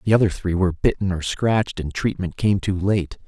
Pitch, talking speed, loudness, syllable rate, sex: 95 Hz, 220 wpm, -22 LUFS, 5.5 syllables/s, male